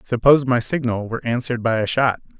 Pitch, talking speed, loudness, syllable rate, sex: 120 Hz, 200 wpm, -19 LUFS, 6.5 syllables/s, male